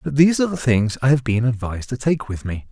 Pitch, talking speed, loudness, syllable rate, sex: 125 Hz, 290 wpm, -20 LUFS, 6.6 syllables/s, male